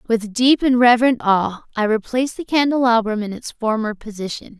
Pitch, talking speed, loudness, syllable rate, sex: 230 Hz, 170 wpm, -18 LUFS, 5.5 syllables/s, female